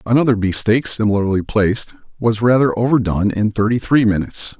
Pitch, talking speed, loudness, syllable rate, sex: 110 Hz, 155 wpm, -16 LUFS, 6.0 syllables/s, male